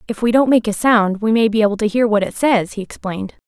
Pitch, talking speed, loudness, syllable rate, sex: 215 Hz, 295 wpm, -16 LUFS, 6.2 syllables/s, female